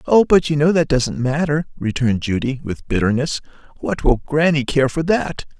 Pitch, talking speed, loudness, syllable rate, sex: 145 Hz, 180 wpm, -18 LUFS, 5.0 syllables/s, male